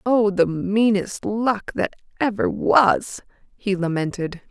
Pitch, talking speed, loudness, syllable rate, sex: 205 Hz, 120 wpm, -21 LUFS, 3.5 syllables/s, female